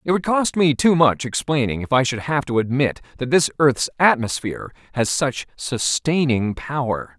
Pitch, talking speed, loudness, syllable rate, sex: 135 Hz, 175 wpm, -20 LUFS, 4.7 syllables/s, male